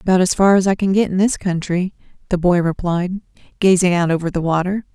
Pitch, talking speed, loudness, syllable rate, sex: 180 Hz, 220 wpm, -17 LUFS, 5.7 syllables/s, female